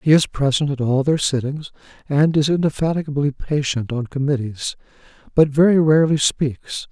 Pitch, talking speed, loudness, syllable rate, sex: 145 Hz, 140 wpm, -19 LUFS, 5.2 syllables/s, male